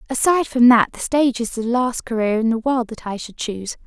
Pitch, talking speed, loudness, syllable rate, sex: 240 Hz, 250 wpm, -19 LUFS, 5.9 syllables/s, female